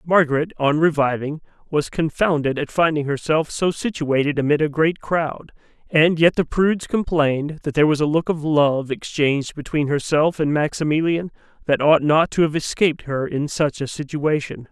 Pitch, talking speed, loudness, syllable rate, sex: 155 Hz, 170 wpm, -20 LUFS, 5.0 syllables/s, male